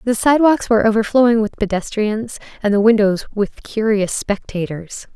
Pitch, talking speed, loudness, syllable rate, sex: 215 Hz, 140 wpm, -17 LUFS, 5.1 syllables/s, female